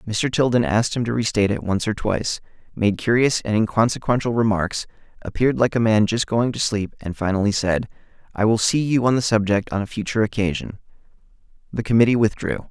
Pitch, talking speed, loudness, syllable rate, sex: 110 Hz, 190 wpm, -20 LUFS, 6.1 syllables/s, male